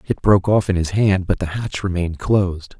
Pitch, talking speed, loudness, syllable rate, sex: 95 Hz, 235 wpm, -19 LUFS, 5.7 syllables/s, male